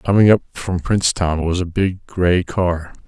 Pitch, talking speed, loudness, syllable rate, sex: 90 Hz, 175 wpm, -18 LUFS, 4.3 syllables/s, male